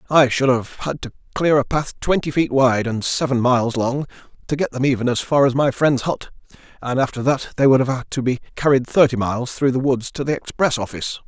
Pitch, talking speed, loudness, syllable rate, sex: 130 Hz, 235 wpm, -19 LUFS, 5.7 syllables/s, male